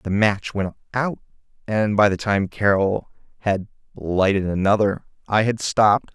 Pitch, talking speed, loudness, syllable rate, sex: 100 Hz, 145 wpm, -21 LUFS, 4.3 syllables/s, male